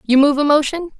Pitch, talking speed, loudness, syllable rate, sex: 290 Hz, 240 wpm, -15 LUFS, 6.3 syllables/s, female